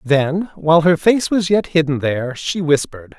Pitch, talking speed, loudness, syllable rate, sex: 160 Hz, 190 wpm, -16 LUFS, 4.9 syllables/s, male